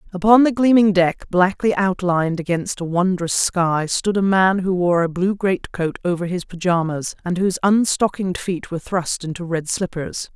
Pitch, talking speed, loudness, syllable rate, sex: 185 Hz, 175 wpm, -19 LUFS, 4.9 syllables/s, female